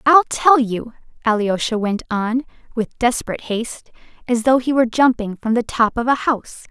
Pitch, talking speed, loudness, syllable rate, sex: 240 Hz, 180 wpm, -18 LUFS, 5.3 syllables/s, female